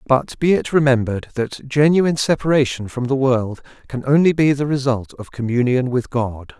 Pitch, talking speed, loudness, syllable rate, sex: 130 Hz, 175 wpm, -18 LUFS, 5.1 syllables/s, male